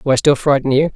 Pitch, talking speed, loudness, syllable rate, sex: 140 Hz, 315 wpm, -15 LUFS, 6.6 syllables/s, female